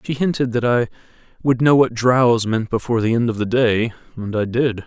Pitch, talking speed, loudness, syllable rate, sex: 120 Hz, 220 wpm, -18 LUFS, 5.2 syllables/s, male